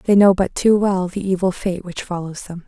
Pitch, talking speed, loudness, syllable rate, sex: 185 Hz, 245 wpm, -19 LUFS, 5.1 syllables/s, female